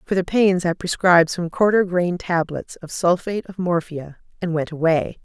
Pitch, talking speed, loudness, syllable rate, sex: 175 Hz, 185 wpm, -20 LUFS, 4.9 syllables/s, female